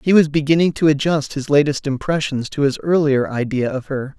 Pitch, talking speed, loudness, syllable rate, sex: 145 Hz, 200 wpm, -18 LUFS, 5.4 syllables/s, male